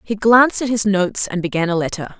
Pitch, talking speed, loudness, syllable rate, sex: 200 Hz, 245 wpm, -17 LUFS, 6.2 syllables/s, female